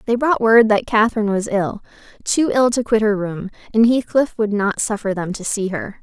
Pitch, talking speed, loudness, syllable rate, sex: 220 Hz, 220 wpm, -18 LUFS, 5.3 syllables/s, female